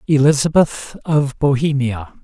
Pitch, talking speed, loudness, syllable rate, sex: 140 Hz, 80 wpm, -16 LUFS, 4.1 syllables/s, male